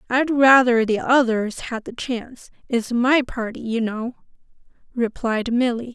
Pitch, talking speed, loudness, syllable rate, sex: 240 Hz, 130 wpm, -20 LUFS, 4.3 syllables/s, female